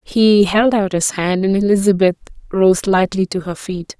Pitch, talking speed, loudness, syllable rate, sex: 195 Hz, 180 wpm, -15 LUFS, 4.5 syllables/s, female